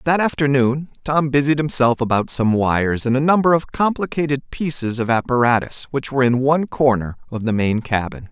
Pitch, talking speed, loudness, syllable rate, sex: 135 Hz, 180 wpm, -18 LUFS, 5.5 syllables/s, male